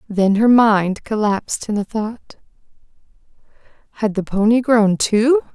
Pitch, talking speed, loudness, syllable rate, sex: 220 Hz, 120 wpm, -17 LUFS, 4.1 syllables/s, female